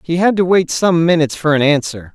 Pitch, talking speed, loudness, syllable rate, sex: 160 Hz, 250 wpm, -14 LUFS, 5.9 syllables/s, male